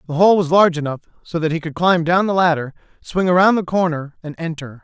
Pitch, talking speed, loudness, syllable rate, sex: 170 Hz, 235 wpm, -17 LUFS, 6.0 syllables/s, male